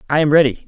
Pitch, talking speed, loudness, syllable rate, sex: 145 Hz, 265 wpm, -14 LUFS, 8.2 syllables/s, male